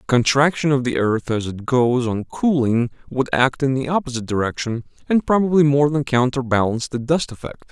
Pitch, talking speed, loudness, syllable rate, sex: 130 Hz, 180 wpm, -19 LUFS, 5.4 syllables/s, male